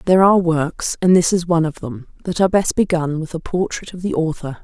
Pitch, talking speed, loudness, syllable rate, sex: 170 Hz, 245 wpm, -18 LUFS, 6.1 syllables/s, female